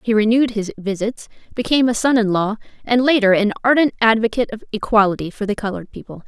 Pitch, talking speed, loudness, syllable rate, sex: 220 Hz, 190 wpm, -18 LUFS, 6.7 syllables/s, female